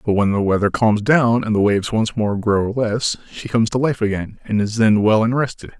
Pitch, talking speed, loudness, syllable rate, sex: 110 Hz, 250 wpm, -18 LUFS, 5.4 syllables/s, male